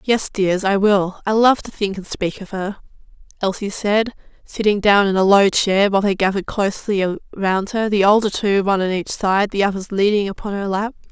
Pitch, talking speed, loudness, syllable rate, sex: 200 Hz, 210 wpm, -18 LUFS, 5.3 syllables/s, female